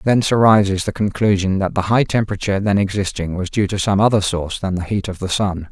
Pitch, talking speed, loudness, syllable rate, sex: 100 Hz, 230 wpm, -18 LUFS, 6.3 syllables/s, male